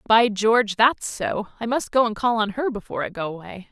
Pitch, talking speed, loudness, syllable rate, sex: 220 Hz, 240 wpm, -22 LUFS, 5.5 syllables/s, female